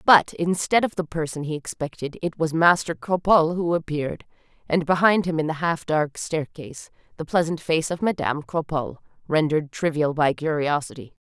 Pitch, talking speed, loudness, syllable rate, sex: 160 Hz, 165 wpm, -23 LUFS, 5.4 syllables/s, female